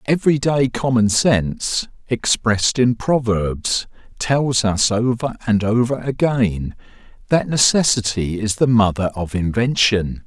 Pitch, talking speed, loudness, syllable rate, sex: 115 Hz, 110 wpm, -18 LUFS, 4.0 syllables/s, male